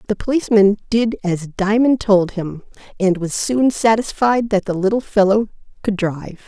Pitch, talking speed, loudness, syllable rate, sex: 205 Hz, 155 wpm, -17 LUFS, 4.9 syllables/s, female